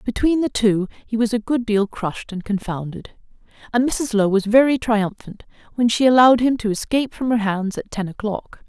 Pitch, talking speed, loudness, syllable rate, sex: 225 Hz, 200 wpm, -19 LUFS, 5.3 syllables/s, female